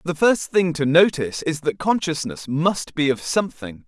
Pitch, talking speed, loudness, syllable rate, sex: 160 Hz, 185 wpm, -21 LUFS, 4.8 syllables/s, male